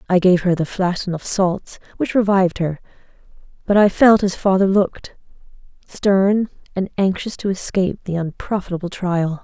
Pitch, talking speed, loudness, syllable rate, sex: 185 Hz, 145 wpm, -18 LUFS, 5.0 syllables/s, female